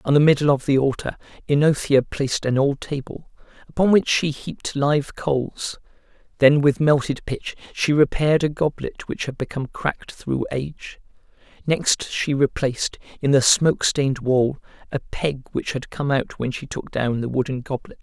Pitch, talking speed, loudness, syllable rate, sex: 140 Hz, 175 wpm, -21 LUFS, 5.0 syllables/s, male